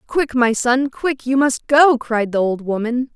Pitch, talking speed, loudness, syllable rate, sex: 250 Hz, 210 wpm, -17 LUFS, 4.1 syllables/s, female